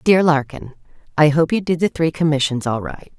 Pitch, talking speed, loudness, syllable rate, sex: 155 Hz, 190 wpm, -18 LUFS, 5.2 syllables/s, female